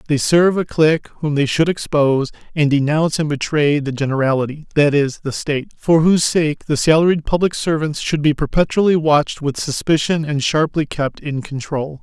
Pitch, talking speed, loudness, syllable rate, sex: 150 Hz, 170 wpm, -17 LUFS, 5.5 syllables/s, male